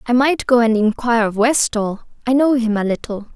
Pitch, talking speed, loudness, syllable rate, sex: 235 Hz, 195 wpm, -17 LUFS, 5.5 syllables/s, female